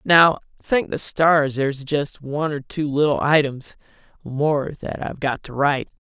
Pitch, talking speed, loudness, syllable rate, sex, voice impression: 145 Hz, 170 wpm, -20 LUFS, 4.5 syllables/s, male, masculine, slightly young, adult-like, thick, slightly relaxed, slightly weak, slightly dark, slightly soft, slightly muffled, slightly halting, slightly cool, slightly intellectual, slightly sincere, calm, slightly mature, slightly friendly, slightly unique, slightly wild, slightly kind, modest